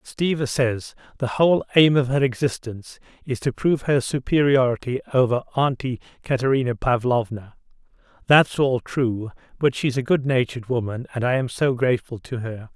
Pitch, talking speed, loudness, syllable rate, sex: 130 Hz, 150 wpm, -22 LUFS, 5.2 syllables/s, male